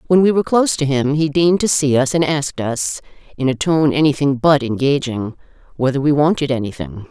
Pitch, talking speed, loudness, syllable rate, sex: 145 Hz, 205 wpm, -16 LUFS, 5.8 syllables/s, female